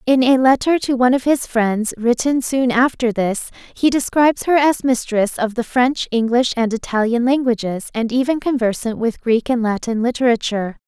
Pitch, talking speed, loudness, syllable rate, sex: 240 Hz, 175 wpm, -17 LUFS, 5.0 syllables/s, female